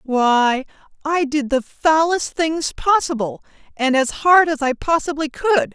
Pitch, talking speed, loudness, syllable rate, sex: 290 Hz, 145 wpm, -18 LUFS, 3.9 syllables/s, female